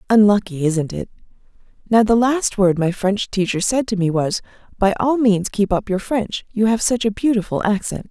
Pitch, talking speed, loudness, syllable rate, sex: 210 Hz, 200 wpm, -18 LUFS, 5.0 syllables/s, female